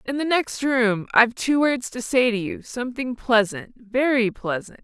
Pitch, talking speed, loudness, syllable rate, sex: 240 Hz, 185 wpm, -22 LUFS, 4.5 syllables/s, female